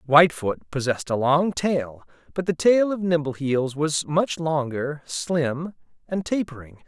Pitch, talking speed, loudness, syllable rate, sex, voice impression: 150 Hz, 140 wpm, -23 LUFS, 4.2 syllables/s, male, masculine, slightly adult-like, thick, tensed, slightly weak, slightly bright, slightly hard, clear, fluent, cool, intellectual, very refreshing, sincere, calm, slightly mature, friendly, reassuring, slightly unique, elegant, wild, slightly sweet, lively, kind, slightly intense